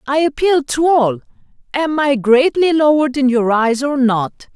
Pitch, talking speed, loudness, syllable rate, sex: 270 Hz, 170 wpm, -15 LUFS, 4.6 syllables/s, female